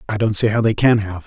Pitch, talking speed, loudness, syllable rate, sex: 105 Hz, 335 wpm, -17 LUFS, 6.1 syllables/s, male